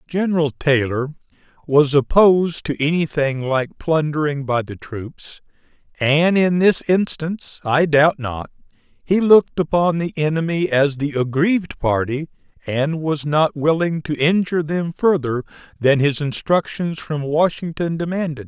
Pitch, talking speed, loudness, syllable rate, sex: 155 Hz, 135 wpm, -19 LUFS, 4.3 syllables/s, male